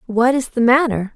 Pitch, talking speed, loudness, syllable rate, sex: 245 Hz, 205 wpm, -16 LUFS, 5.1 syllables/s, female